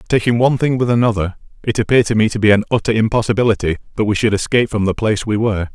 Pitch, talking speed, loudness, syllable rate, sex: 110 Hz, 240 wpm, -16 LUFS, 7.7 syllables/s, male